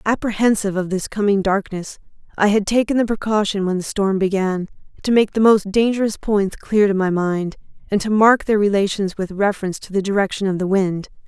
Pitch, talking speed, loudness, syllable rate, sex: 200 Hz, 195 wpm, -19 LUFS, 5.6 syllables/s, female